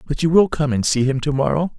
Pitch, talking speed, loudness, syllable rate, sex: 140 Hz, 305 wpm, -18 LUFS, 6.1 syllables/s, male